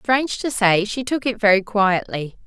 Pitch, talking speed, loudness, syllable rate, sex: 215 Hz, 195 wpm, -19 LUFS, 4.7 syllables/s, female